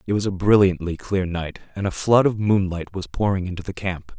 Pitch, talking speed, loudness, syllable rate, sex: 95 Hz, 230 wpm, -22 LUFS, 5.4 syllables/s, male